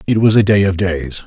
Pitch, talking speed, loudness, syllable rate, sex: 95 Hz, 285 wpm, -14 LUFS, 5.3 syllables/s, male